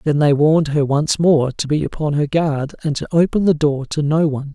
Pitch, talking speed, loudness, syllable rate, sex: 150 Hz, 250 wpm, -17 LUFS, 5.4 syllables/s, male